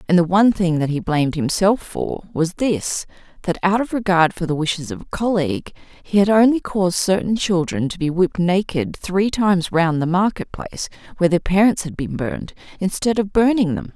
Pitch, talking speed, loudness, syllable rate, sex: 185 Hz, 200 wpm, -19 LUFS, 5.5 syllables/s, female